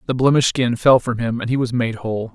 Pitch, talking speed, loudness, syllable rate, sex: 120 Hz, 280 wpm, -18 LUFS, 6.4 syllables/s, male